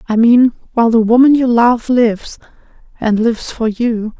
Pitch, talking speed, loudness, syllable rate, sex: 230 Hz, 170 wpm, -13 LUFS, 5.0 syllables/s, female